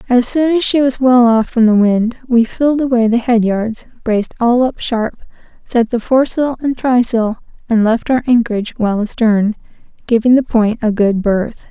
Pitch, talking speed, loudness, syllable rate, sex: 235 Hz, 190 wpm, -14 LUFS, 4.8 syllables/s, female